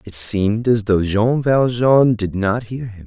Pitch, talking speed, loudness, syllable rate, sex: 110 Hz, 195 wpm, -17 LUFS, 4.0 syllables/s, male